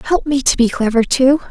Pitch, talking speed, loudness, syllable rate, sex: 260 Hz, 240 wpm, -14 LUFS, 5.2 syllables/s, female